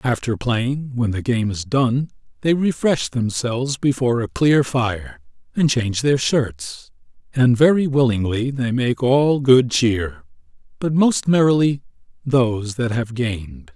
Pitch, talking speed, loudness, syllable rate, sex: 125 Hz, 145 wpm, -19 LUFS, 4.1 syllables/s, male